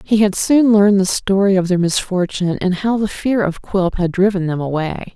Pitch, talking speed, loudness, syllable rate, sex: 190 Hz, 220 wpm, -16 LUFS, 5.2 syllables/s, female